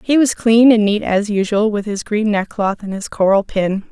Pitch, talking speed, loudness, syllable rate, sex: 210 Hz, 230 wpm, -16 LUFS, 4.8 syllables/s, female